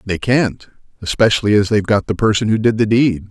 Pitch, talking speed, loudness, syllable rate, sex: 105 Hz, 200 wpm, -15 LUFS, 5.9 syllables/s, male